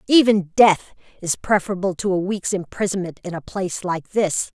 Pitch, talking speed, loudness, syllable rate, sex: 190 Hz, 170 wpm, -21 LUFS, 5.3 syllables/s, female